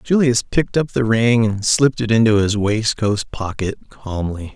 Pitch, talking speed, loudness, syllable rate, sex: 110 Hz, 170 wpm, -18 LUFS, 4.4 syllables/s, male